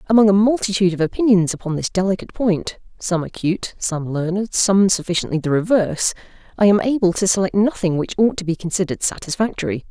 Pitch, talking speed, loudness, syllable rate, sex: 190 Hz, 165 wpm, -19 LUFS, 6.3 syllables/s, female